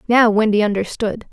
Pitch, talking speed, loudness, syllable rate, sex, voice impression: 215 Hz, 135 wpm, -17 LUFS, 5.2 syllables/s, female, feminine, slightly young, tensed, powerful, clear, raspy, intellectual, calm, lively, slightly sharp